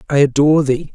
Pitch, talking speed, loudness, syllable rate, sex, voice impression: 145 Hz, 190 wpm, -14 LUFS, 6.5 syllables/s, female, very feminine, middle-aged, very thin, relaxed, slightly weak, slightly dark, very soft, clear, fluent, slightly raspy, very cute, intellectual, refreshing, very sincere, calm, friendly, reassuring, slightly unique, slightly elegant, slightly wild, sweet, lively, kind, intense